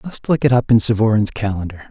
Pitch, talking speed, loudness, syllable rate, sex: 115 Hz, 250 wpm, -17 LUFS, 6.6 syllables/s, male